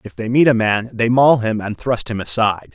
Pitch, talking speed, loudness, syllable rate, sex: 115 Hz, 260 wpm, -17 LUFS, 5.3 syllables/s, male